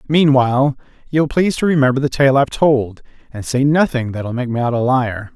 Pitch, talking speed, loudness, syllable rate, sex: 135 Hz, 200 wpm, -16 LUFS, 5.5 syllables/s, male